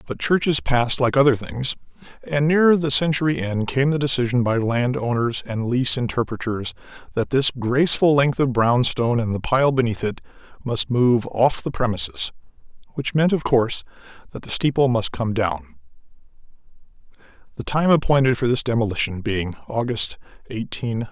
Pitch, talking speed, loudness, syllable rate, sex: 120 Hz, 160 wpm, -20 LUFS, 5.3 syllables/s, male